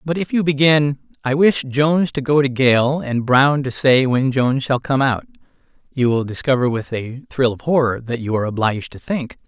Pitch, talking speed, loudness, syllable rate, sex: 135 Hz, 215 wpm, -18 LUFS, 5.1 syllables/s, male